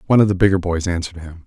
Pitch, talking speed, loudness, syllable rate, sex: 90 Hz, 285 wpm, -18 LUFS, 8.4 syllables/s, male